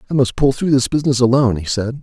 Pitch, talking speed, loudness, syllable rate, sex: 125 Hz, 265 wpm, -16 LUFS, 7.2 syllables/s, male